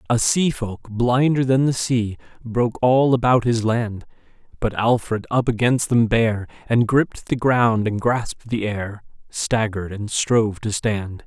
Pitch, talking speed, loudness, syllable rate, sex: 115 Hz, 165 wpm, -20 LUFS, 4.2 syllables/s, male